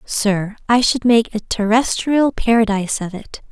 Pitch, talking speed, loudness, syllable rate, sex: 225 Hz, 155 wpm, -17 LUFS, 4.3 syllables/s, female